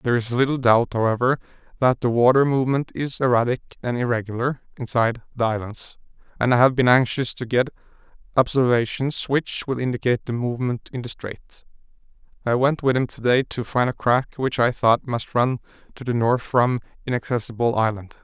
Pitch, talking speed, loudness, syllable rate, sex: 125 Hz, 175 wpm, -22 LUFS, 5.7 syllables/s, male